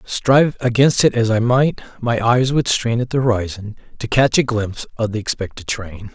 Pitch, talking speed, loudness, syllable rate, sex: 115 Hz, 205 wpm, -17 LUFS, 5.1 syllables/s, male